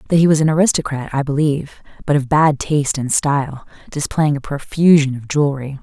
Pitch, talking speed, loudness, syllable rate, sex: 145 Hz, 185 wpm, -17 LUFS, 6.0 syllables/s, female